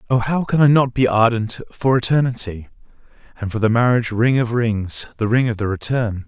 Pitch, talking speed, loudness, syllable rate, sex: 115 Hz, 190 wpm, -18 LUFS, 5.4 syllables/s, male